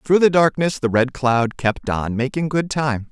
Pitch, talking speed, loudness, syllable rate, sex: 135 Hz, 210 wpm, -19 LUFS, 4.3 syllables/s, male